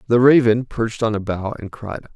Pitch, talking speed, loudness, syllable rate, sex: 110 Hz, 225 wpm, -18 LUFS, 5.6 syllables/s, male